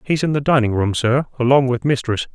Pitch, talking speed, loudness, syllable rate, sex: 125 Hz, 230 wpm, -18 LUFS, 5.8 syllables/s, male